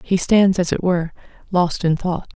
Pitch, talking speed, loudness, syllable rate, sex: 180 Hz, 200 wpm, -18 LUFS, 4.9 syllables/s, female